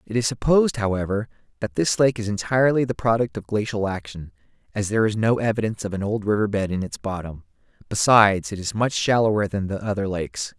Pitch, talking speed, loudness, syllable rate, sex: 110 Hz, 205 wpm, -22 LUFS, 6.3 syllables/s, male